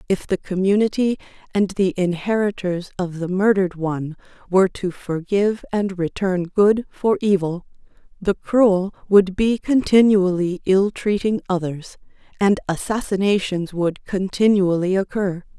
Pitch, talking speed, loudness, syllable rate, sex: 190 Hz, 120 wpm, -20 LUFS, 4.4 syllables/s, female